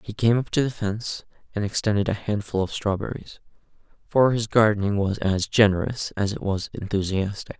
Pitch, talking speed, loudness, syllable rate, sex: 105 Hz, 175 wpm, -24 LUFS, 5.5 syllables/s, male